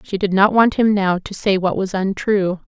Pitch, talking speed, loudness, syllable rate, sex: 195 Hz, 245 wpm, -17 LUFS, 4.7 syllables/s, female